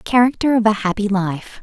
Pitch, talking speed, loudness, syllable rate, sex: 215 Hz, 185 wpm, -17 LUFS, 5.0 syllables/s, female